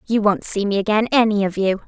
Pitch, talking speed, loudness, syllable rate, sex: 205 Hz, 255 wpm, -18 LUFS, 6.1 syllables/s, female